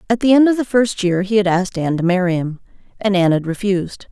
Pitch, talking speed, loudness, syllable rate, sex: 195 Hz, 265 wpm, -17 LUFS, 6.8 syllables/s, female